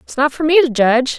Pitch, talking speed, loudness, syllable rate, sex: 275 Hz, 305 wpm, -14 LUFS, 5.8 syllables/s, female